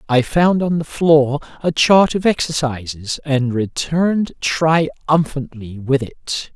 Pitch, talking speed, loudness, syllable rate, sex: 145 Hz, 130 wpm, -17 LUFS, 3.5 syllables/s, male